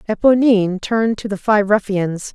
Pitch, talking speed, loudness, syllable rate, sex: 210 Hz, 155 wpm, -16 LUFS, 5.1 syllables/s, female